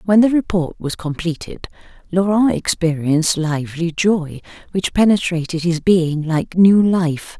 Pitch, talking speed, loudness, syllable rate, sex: 175 Hz, 130 wpm, -17 LUFS, 4.3 syllables/s, female